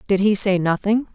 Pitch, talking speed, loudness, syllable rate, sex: 200 Hz, 210 wpm, -18 LUFS, 5.3 syllables/s, female